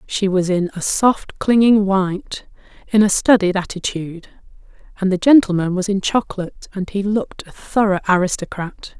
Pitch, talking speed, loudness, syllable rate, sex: 195 Hz, 155 wpm, -17 LUFS, 5.1 syllables/s, female